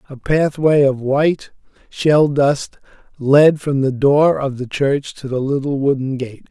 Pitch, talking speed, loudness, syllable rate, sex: 140 Hz, 165 wpm, -16 LUFS, 4.0 syllables/s, male